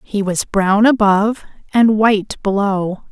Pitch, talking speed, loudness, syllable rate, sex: 205 Hz, 135 wpm, -15 LUFS, 4.1 syllables/s, female